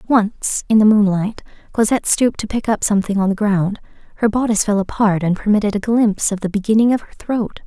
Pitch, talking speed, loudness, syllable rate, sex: 210 Hz, 210 wpm, -17 LUFS, 6.1 syllables/s, female